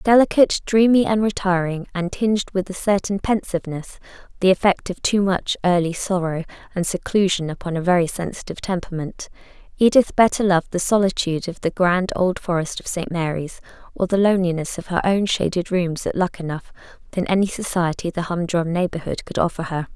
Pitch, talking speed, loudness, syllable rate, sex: 185 Hz, 170 wpm, -21 LUFS, 5.7 syllables/s, female